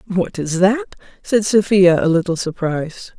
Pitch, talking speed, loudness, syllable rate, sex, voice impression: 190 Hz, 150 wpm, -17 LUFS, 4.6 syllables/s, female, feminine, middle-aged, slightly relaxed, bright, slightly hard, slightly muffled, slightly raspy, intellectual, friendly, reassuring, kind, slightly modest